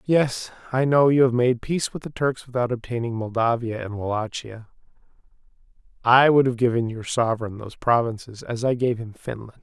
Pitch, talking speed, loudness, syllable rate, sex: 120 Hz, 175 wpm, -23 LUFS, 5.5 syllables/s, male